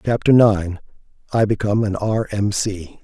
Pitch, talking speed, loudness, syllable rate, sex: 105 Hz, 140 wpm, -18 LUFS, 4.6 syllables/s, male